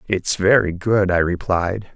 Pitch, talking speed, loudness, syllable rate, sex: 95 Hz, 155 wpm, -18 LUFS, 4.0 syllables/s, male